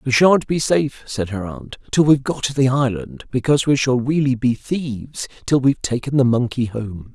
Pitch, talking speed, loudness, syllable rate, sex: 130 Hz, 210 wpm, -19 LUFS, 5.3 syllables/s, male